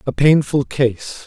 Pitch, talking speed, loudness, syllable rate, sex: 140 Hz, 140 wpm, -16 LUFS, 3.7 syllables/s, male